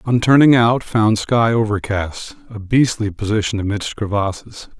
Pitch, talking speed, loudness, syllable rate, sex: 110 Hz, 140 wpm, -17 LUFS, 4.5 syllables/s, male